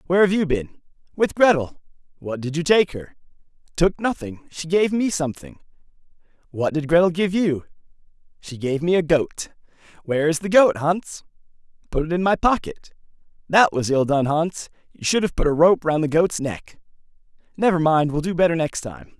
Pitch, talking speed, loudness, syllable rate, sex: 165 Hz, 185 wpm, -20 LUFS, 5.2 syllables/s, male